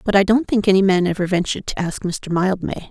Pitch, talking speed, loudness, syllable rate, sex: 190 Hz, 250 wpm, -19 LUFS, 6.1 syllables/s, female